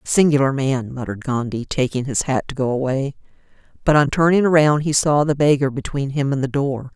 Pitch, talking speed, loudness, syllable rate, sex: 140 Hz, 200 wpm, -19 LUFS, 5.5 syllables/s, female